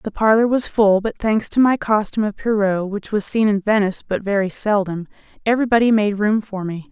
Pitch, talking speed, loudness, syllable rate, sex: 210 Hz, 210 wpm, -18 LUFS, 5.6 syllables/s, female